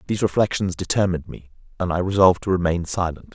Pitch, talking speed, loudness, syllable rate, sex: 90 Hz, 180 wpm, -21 LUFS, 6.9 syllables/s, male